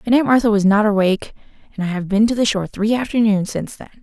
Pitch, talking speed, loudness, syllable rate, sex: 215 Hz, 240 wpm, -17 LUFS, 7.0 syllables/s, female